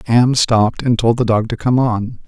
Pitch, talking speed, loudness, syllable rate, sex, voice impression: 115 Hz, 240 wpm, -15 LUFS, 4.9 syllables/s, male, masculine, adult-like, tensed, slightly bright, slightly soft, fluent, cool, intellectual, calm, wild, kind, modest